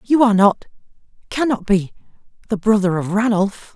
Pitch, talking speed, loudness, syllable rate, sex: 210 Hz, 145 wpm, -17 LUFS, 5.4 syllables/s, male